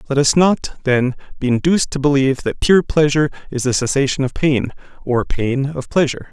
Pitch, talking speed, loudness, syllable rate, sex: 140 Hz, 190 wpm, -17 LUFS, 5.7 syllables/s, male